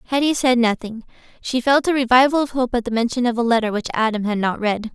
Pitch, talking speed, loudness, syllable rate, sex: 240 Hz, 245 wpm, -19 LUFS, 6.4 syllables/s, female